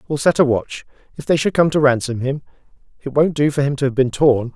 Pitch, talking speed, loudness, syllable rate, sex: 140 Hz, 265 wpm, -17 LUFS, 6.0 syllables/s, male